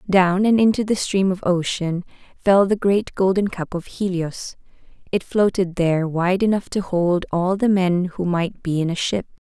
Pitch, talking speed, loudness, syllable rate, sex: 185 Hz, 190 wpm, -20 LUFS, 4.5 syllables/s, female